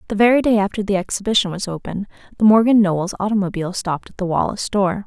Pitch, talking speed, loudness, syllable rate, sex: 200 Hz, 200 wpm, -18 LUFS, 7.4 syllables/s, female